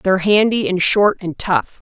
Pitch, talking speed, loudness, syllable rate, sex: 190 Hz, 190 wpm, -16 LUFS, 4.6 syllables/s, female